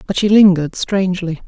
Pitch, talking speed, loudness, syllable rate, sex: 185 Hz, 165 wpm, -14 LUFS, 6.1 syllables/s, female